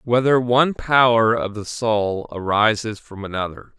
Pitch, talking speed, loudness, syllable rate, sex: 110 Hz, 145 wpm, -19 LUFS, 4.3 syllables/s, male